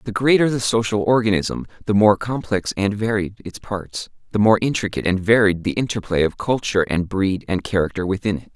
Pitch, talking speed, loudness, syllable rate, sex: 105 Hz, 190 wpm, -20 LUFS, 5.5 syllables/s, male